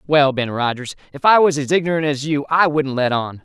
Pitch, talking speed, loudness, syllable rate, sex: 145 Hz, 245 wpm, -17 LUFS, 5.5 syllables/s, male